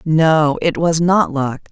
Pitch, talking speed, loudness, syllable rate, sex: 155 Hz, 175 wpm, -15 LUFS, 3.2 syllables/s, female